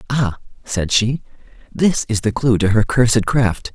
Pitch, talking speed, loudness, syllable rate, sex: 115 Hz, 175 wpm, -17 LUFS, 4.2 syllables/s, male